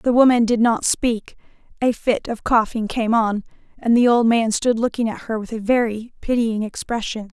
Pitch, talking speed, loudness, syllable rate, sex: 230 Hz, 195 wpm, -19 LUFS, 4.8 syllables/s, female